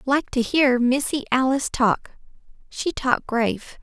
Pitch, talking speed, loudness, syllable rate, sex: 260 Hz, 140 wpm, -21 LUFS, 4.3 syllables/s, female